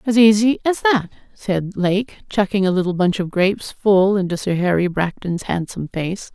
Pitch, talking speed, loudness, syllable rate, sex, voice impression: 195 Hz, 180 wpm, -19 LUFS, 4.8 syllables/s, female, very feminine, adult-like, slightly middle-aged, thin, slightly relaxed, slightly weak, slightly bright, soft, slightly muffled, fluent, slightly cute, intellectual, refreshing, very sincere, calm, very friendly, very reassuring, slightly unique, very elegant, sweet, slightly lively, very kind, modest